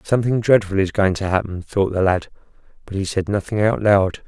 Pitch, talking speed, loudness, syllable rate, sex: 100 Hz, 210 wpm, -19 LUFS, 5.5 syllables/s, male